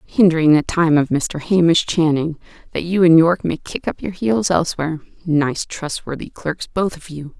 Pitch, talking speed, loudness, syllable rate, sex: 165 Hz, 185 wpm, -18 LUFS, 4.9 syllables/s, female